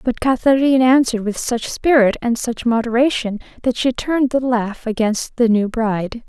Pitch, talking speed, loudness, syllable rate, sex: 240 Hz, 170 wpm, -17 LUFS, 5.1 syllables/s, female